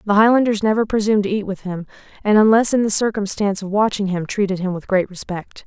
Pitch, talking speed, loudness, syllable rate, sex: 205 Hz, 225 wpm, -18 LUFS, 6.4 syllables/s, female